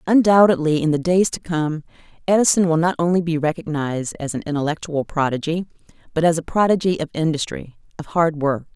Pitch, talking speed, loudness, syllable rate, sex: 165 Hz, 165 wpm, -19 LUFS, 5.8 syllables/s, female